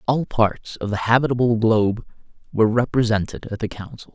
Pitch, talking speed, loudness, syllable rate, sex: 115 Hz, 160 wpm, -20 LUFS, 5.6 syllables/s, male